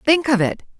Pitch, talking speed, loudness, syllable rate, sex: 260 Hz, 225 wpm, -18 LUFS, 5.4 syllables/s, female